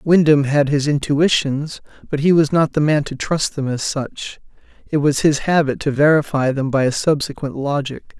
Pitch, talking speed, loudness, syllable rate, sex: 145 Hz, 190 wpm, -17 LUFS, 4.8 syllables/s, male